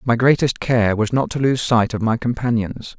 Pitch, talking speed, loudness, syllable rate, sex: 120 Hz, 220 wpm, -18 LUFS, 4.9 syllables/s, male